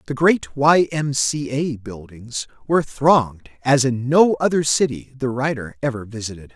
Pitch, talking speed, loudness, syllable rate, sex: 130 Hz, 165 wpm, -19 LUFS, 4.6 syllables/s, male